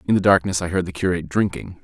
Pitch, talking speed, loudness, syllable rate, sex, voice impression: 90 Hz, 260 wpm, -20 LUFS, 7.1 syllables/s, male, masculine, adult-like, tensed, powerful, clear, fluent, cool, intellectual, calm, slightly mature, slightly friendly, reassuring, wild, lively